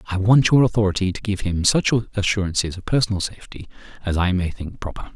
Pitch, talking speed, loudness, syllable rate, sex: 100 Hz, 200 wpm, -20 LUFS, 6.5 syllables/s, male